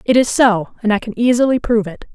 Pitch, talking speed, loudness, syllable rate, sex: 225 Hz, 250 wpm, -15 LUFS, 6.3 syllables/s, female